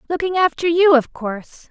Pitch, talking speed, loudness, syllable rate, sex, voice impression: 315 Hz, 175 wpm, -17 LUFS, 5.3 syllables/s, female, feminine, slightly young, slightly soft, cute, slightly refreshing, friendly, kind